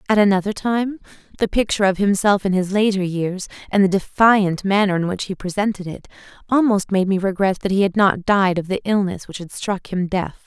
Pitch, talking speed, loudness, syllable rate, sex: 195 Hz, 210 wpm, -19 LUFS, 5.5 syllables/s, female